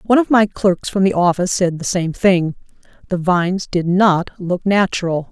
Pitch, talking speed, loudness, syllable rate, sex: 185 Hz, 180 wpm, -17 LUFS, 5.0 syllables/s, female